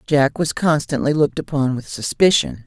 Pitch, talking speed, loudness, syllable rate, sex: 145 Hz, 160 wpm, -18 LUFS, 5.1 syllables/s, female